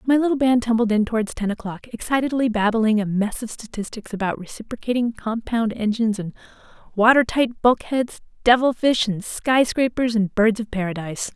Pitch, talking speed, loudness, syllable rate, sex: 225 Hz, 160 wpm, -21 LUFS, 5.4 syllables/s, female